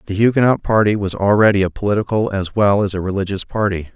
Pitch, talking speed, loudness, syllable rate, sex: 100 Hz, 195 wpm, -17 LUFS, 6.3 syllables/s, male